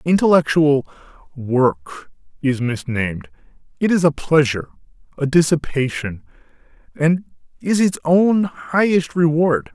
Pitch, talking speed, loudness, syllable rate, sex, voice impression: 150 Hz, 100 wpm, -18 LUFS, 4.2 syllables/s, male, masculine, very middle-aged, slightly thick, muffled, sincere, slightly unique